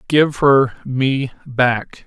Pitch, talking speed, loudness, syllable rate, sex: 135 Hz, 115 wpm, -17 LUFS, 2.5 syllables/s, male